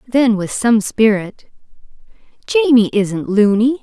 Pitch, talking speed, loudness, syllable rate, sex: 225 Hz, 110 wpm, -15 LUFS, 3.7 syllables/s, female